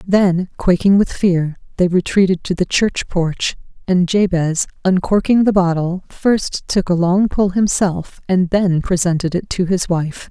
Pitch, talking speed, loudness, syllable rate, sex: 185 Hz, 165 wpm, -16 LUFS, 4.1 syllables/s, female